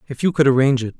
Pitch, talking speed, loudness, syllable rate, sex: 135 Hz, 305 wpm, -17 LUFS, 8.5 syllables/s, male